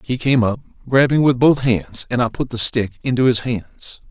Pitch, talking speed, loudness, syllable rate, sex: 120 Hz, 220 wpm, -17 LUFS, 4.9 syllables/s, male